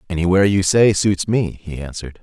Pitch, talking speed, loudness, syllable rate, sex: 95 Hz, 190 wpm, -17 LUFS, 5.9 syllables/s, male